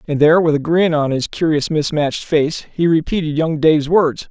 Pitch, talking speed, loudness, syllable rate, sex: 155 Hz, 210 wpm, -16 LUFS, 5.4 syllables/s, male